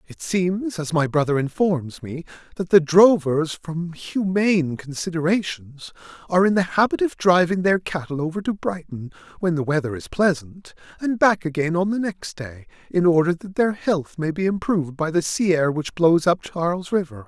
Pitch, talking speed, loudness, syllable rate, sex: 170 Hz, 185 wpm, -21 LUFS, 4.6 syllables/s, male